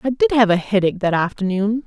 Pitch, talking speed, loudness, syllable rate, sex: 215 Hz, 225 wpm, -18 LUFS, 6.3 syllables/s, female